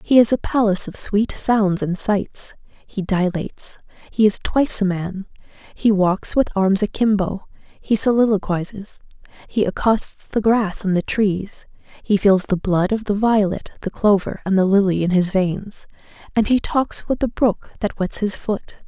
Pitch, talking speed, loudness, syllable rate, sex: 200 Hz, 175 wpm, -19 LUFS, 4.4 syllables/s, female